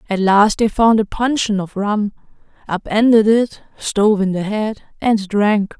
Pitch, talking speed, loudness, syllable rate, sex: 210 Hz, 165 wpm, -16 LUFS, 4.2 syllables/s, female